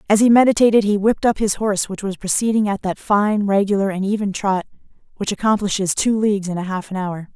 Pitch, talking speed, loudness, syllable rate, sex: 200 Hz, 220 wpm, -18 LUFS, 6.2 syllables/s, female